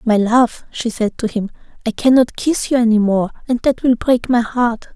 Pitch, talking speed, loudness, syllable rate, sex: 235 Hz, 230 wpm, -16 LUFS, 4.8 syllables/s, female